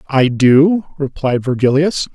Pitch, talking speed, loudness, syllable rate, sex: 140 Hz, 110 wpm, -14 LUFS, 3.8 syllables/s, male